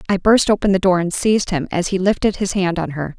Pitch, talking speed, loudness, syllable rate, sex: 185 Hz, 280 wpm, -17 LUFS, 6.1 syllables/s, female